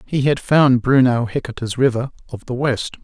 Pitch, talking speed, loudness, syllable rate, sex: 125 Hz, 180 wpm, -17 LUFS, 4.9 syllables/s, male